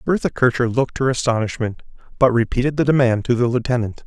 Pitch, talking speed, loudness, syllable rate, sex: 125 Hz, 175 wpm, -19 LUFS, 6.4 syllables/s, male